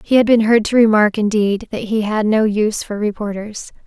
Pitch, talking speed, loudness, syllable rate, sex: 215 Hz, 215 wpm, -16 LUFS, 5.2 syllables/s, female